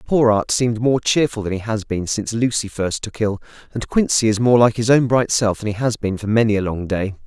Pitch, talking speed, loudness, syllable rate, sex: 110 Hz, 265 wpm, -18 LUFS, 5.7 syllables/s, male